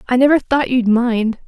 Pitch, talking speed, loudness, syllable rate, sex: 245 Hz, 205 wpm, -15 LUFS, 4.7 syllables/s, female